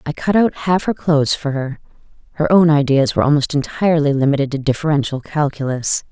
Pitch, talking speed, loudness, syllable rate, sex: 150 Hz, 175 wpm, -16 LUFS, 6.0 syllables/s, female